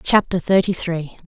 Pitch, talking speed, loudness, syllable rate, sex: 180 Hz, 140 wpm, -19 LUFS, 4.6 syllables/s, female